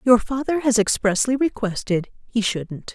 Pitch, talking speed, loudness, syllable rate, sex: 225 Hz, 145 wpm, -21 LUFS, 4.5 syllables/s, female